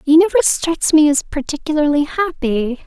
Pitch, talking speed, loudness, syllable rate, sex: 300 Hz, 145 wpm, -16 LUFS, 5.3 syllables/s, female